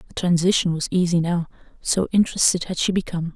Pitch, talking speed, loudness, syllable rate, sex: 175 Hz, 180 wpm, -21 LUFS, 6.4 syllables/s, female